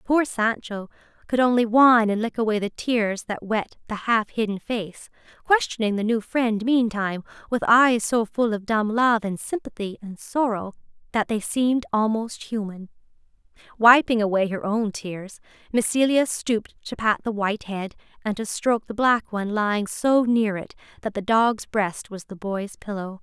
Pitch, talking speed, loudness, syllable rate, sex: 220 Hz, 175 wpm, -23 LUFS, 4.8 syllables/s, female